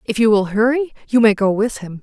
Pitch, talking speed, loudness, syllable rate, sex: 220 Hz, 265 wpm, -16 LUFS, 5.7 syllables/s, female